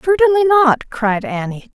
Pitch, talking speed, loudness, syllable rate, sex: 270 Hz, 135 wpm, -15 LUFS, 4.2 syllables/s, female